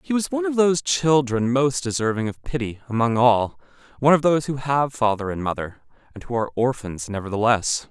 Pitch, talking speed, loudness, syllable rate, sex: 125 Hz, 190 wpm, -21 LUFS, 5.8 syllables/s, male